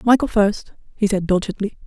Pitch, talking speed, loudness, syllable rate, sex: 205 Hz, 160 wpm, -19 LUFS, 5.4 syllables/s, female